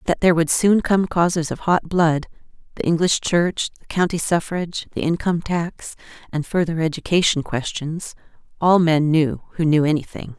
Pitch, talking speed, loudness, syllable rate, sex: 165 Hz, 150 wpm, -20 LUFS, 5.0 syllables/s, female